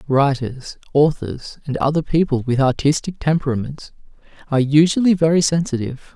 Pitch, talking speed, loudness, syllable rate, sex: 145 Hz, 115 wpm, -18 LUFS, 5.4 syllables/s, male